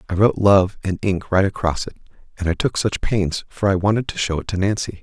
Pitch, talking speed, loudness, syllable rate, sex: 95 Hz, 250 wpm, -20 LUFS, 5.8 syllables/s, male